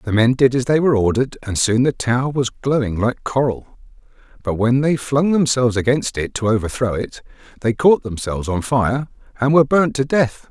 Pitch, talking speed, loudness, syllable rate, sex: 125 Hz, 200 wpm, -18 LUFS, 5.5 syllables/s, male